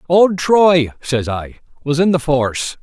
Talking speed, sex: 170 wpm, male